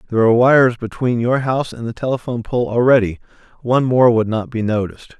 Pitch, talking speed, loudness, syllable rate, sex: 120 Hz, 185 wpm, -16 LUFS, 6.6 syllables/s, male